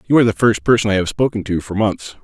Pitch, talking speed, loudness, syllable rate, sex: 105 Hz, 295 wpm, -17 LUFS, 6.8 syllables/s, male